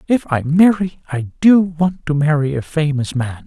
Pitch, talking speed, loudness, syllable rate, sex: 155 Hz, 190 wpm, -16 LUFS, 4.4 syllables/s, male